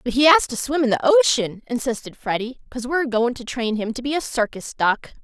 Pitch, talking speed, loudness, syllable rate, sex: 250 Hz, 240 wpm, -21 LUFS, 5.9 syllables/s, female